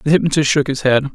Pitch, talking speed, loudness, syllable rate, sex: 140 Hz, 260 wpm, -15 LUFS, 6.4 syllables/s, male